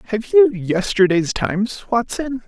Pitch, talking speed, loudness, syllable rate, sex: 205 Hz, 120 wpm, -18 LUFS, 4.1 syllables/s, male